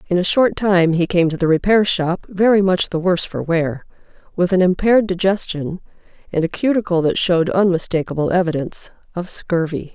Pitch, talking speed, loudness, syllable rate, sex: 180 Hz, 175 wpm, -17 LUFS, 5.5 syllables/s, female